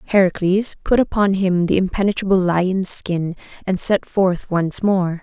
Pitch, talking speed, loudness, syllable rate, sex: 185 Hz, 150 wpm, -18 LUFS, 4.4 syllables/s, female